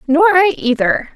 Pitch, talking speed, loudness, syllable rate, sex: 315 Hz, 155 wpm, -13 LUFS, 4.0 syllables/s, female